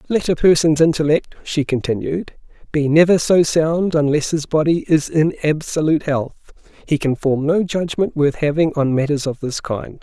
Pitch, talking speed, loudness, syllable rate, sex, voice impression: 155 Hz, 175 wpm, -17 LUFS, 4.9 syllables/s, male, very masculine, very adult-like, middle-aged, thick, tensed, slightly weak, slightly bright, hard, clear, fluent, very cool, intellectual, slightly refreshing, sincere, very calm, mature, friendly, reassuring, slightly unique, very elegant, slightly wild, sweet, slightly lively, kind